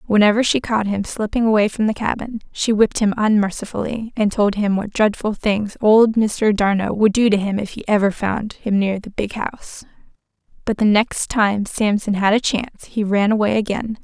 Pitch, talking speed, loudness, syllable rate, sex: 210 Hz, 200 wpm, -18 LUFS, 5.1 syllables/s, female